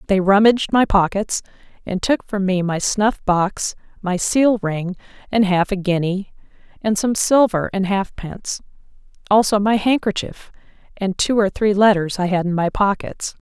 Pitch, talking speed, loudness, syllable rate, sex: 200 Hz, 160 wpm, -18 LUFS, 4.6 syllables/s, female